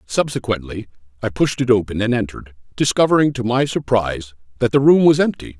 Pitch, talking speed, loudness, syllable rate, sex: 115 Hz, 170 wpm, -18 LUFS, 6.0 syllables/s, male